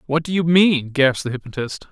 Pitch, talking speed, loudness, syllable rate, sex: 150 Hz, 220 wpm, -18 LUFS, 5.8 syllables/s, male